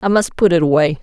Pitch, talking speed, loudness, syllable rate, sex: 175 Hz, 290 wpm, -14 LUFS, 6.5 syllables/s, female